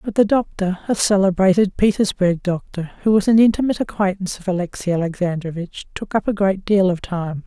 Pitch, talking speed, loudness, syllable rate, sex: 190 Hz, 175 wpm, -19 LUFS, 5.8 syllables/s, female